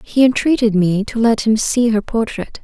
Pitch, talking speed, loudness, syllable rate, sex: 225 Hz, 205 wpm, -16 LUFS, 4.7 syllables/s, female